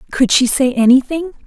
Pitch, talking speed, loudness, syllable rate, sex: 265 Hz, 165 wpm, -13 LUFS, 5.5 syllables/s, female